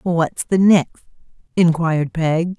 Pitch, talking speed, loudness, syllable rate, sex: 170 Hz, 115 wpm, -17 LUFS, 3.6 syllables/s, female